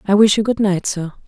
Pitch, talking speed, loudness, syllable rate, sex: 200 Hz, 280 wpm, -16 LUFS, 5.6 syllables/s, female